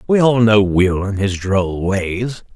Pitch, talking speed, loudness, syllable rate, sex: 105 Hz, 190 wpm, -16 LUFS, 3.5 syllables/s, male